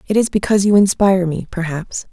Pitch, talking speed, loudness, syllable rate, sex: 190 Hz, 200 wpm, -16 LUFS, 6.3 syllables/s, female